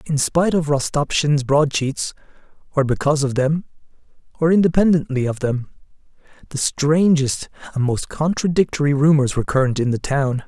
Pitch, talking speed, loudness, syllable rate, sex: 145 Hz, 135 wpm, -19 LUFS, 5.3 syllables/s, male